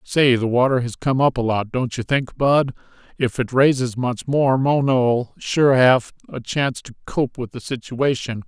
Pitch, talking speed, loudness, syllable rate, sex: 125 Hz, 190 wpm, -19 LUFS, 4.3 syllables/s, male